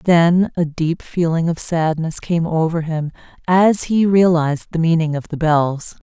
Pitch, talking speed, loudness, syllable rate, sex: 165 Hz, 170 wpm, -17 LUFS, 4.2 syllables/s, female